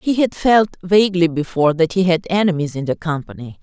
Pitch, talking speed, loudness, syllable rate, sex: 175 Hz, 200 wpm, -17 LUFS, 6.0 syllables/s, female